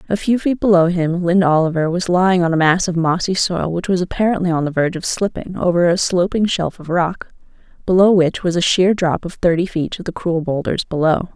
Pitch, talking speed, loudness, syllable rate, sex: 175 Hz, 225 wpm, -17 LUFS, 5.7 syllables/s, female